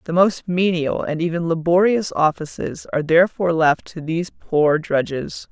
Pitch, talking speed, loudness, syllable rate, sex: 165 Hz, 150 wpm, -19 LUFS, 4.8 syllables/s, female